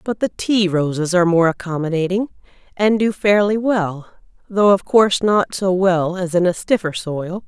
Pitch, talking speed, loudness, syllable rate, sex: 185 Hz, 175 wpm, -17 LUFS, 4.8 syllables/s, female